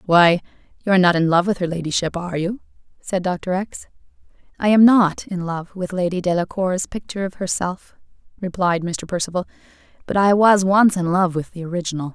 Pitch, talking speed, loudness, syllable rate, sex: 180 Hz, 185 wpm, -19 LUFS, 5.6 syllables/s, female